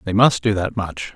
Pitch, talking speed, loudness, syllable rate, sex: 105 Hz, 260 wpm, -19 LUFS, 4.9 syllables/s, male